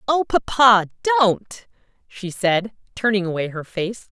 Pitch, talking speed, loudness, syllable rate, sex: 210 Hz, 130 wpm, -19 LUFS, 3.9 syllables/s, female